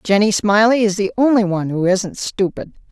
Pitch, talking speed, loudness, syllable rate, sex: 205 Hz, 185 wpm, -16 LUFS, 5.2 syllables/s, female